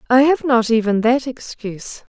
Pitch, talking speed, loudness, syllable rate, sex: 245 Hz, 165 wpm, -17 LUFS, 4.8 syllables/s, female